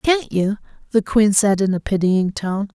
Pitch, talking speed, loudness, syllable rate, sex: 205 Hz, 195 wpm, -18 LUFS, 4.4 syllables/s, female